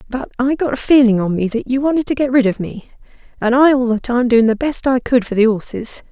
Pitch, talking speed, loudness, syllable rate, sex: 245 Hz, 275 wpm, -15 LUFS, 5.8 syllables/s, female